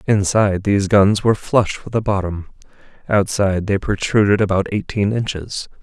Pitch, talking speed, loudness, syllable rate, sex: 100 Hz, 145 wpm, -18 LUFS, 5.2 syllables/s, male